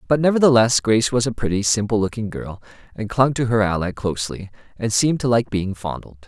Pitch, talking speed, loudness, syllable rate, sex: 110 Hz, 200 wpm, -19 LUFS, 6.0 syllables/s, male